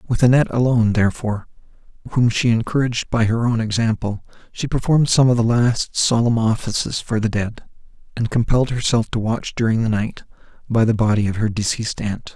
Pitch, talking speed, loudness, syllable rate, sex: 115 Hz, 180 wpm, -19 LUFS, 5.9 syllables/s, male